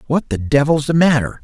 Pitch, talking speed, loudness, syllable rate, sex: 140 Hz, 210 wpm, -16 LUFS, 5.5 syllables/s, male